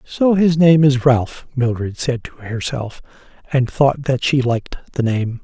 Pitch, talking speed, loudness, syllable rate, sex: 130 Hz, 175 wpm, -17 LUFS, 4.3 syllables/s, male